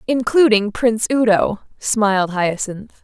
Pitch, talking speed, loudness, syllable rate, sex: 220 Hz, 100 wpm, -17 LUFS, 4.1 syllables/s, female